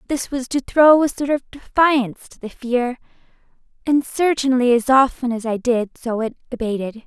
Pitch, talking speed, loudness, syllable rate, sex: 255 Hz, 180 wpm, -19 LUFS, 4.8 syllables/s, female